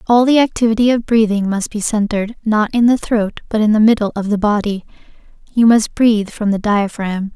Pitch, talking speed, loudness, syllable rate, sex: 215 Hz, 195 wpm, -15 LUFS, 5.5 syllables/s, female